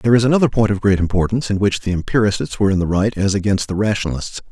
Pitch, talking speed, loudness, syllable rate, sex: 105 Hz, 255 wpm, -17 LUFS, 7.5 syllables/s, male